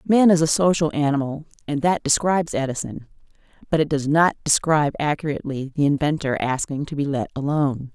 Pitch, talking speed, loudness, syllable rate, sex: 150 Hz, 165 wpm, -21 LUFS, 5.9 syllables/s, female